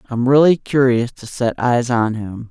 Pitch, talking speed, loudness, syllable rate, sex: 125 Hz, 190 wpm, -17 LUFS, 4.3 syllables/s, male